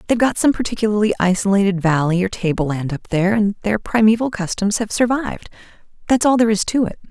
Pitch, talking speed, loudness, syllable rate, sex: 205 Hz, 185 wpm, -18 LUFS, 6.4 syllables/s, female